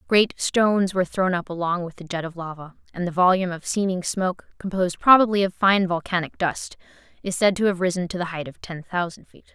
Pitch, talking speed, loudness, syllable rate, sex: 180 Hz, 220 wpm, -22 LUFS, 6.0 syllables/s, female